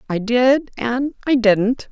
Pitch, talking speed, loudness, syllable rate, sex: 245 Hz, 155 wpm, -18 LUFS, 3.2 syllables/s, female